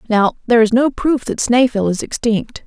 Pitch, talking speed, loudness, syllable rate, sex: 235 Hz, 200 wpm, -16 LUFS, 5.0 syllables/s, female